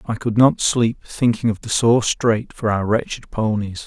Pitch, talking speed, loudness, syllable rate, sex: 110 Hz, 200 wpm, -19 LUFS, 4.3 syllables/s, male